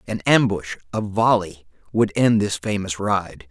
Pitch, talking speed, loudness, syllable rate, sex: 100 Hz, 155 wpm, -21 LUFS, 4.1 syllables/s, male